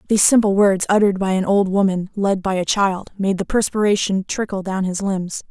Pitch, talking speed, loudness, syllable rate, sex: 195 Hz, 205 wpm, -18 LUFS, 5.5 syllables/s, female